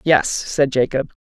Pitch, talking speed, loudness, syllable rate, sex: 140 Hz, 145 wpm, -18 LUFS, 3.9 syllables/s, female